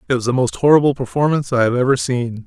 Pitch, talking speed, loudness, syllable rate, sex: 130 Hz, 245 wpm, -17 LUFS, 7.0 syllables/s, male